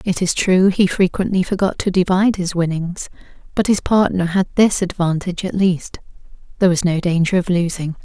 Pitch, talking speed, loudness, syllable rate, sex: 180 Hz, 180 wpm, -17 LUFS, 5.5 syllables/s, female